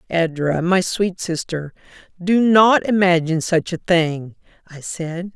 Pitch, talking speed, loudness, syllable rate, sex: 175 Hz, 135 wpm, -18 LUFS, 3.9 syllables/s, female